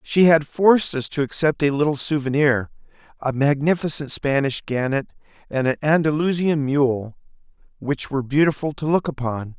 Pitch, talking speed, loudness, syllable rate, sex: 145 Hz, 145 wpm, -20 LUFS, 5.0 syllables/s, male